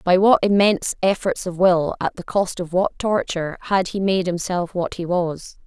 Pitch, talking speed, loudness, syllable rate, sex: 185 Hz, 200 wpm, -20 LUFS, 4.7 syllables/s, female